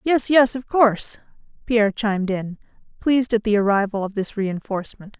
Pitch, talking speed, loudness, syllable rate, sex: 220 Hz, 160 wpm, -20 LUFS, 5.5 syllables/s, female